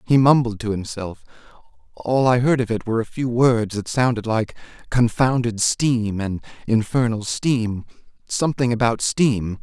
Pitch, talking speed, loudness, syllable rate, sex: 115 Hz, 145 wpm, -20 LUFS, 4.5 syllables/s, male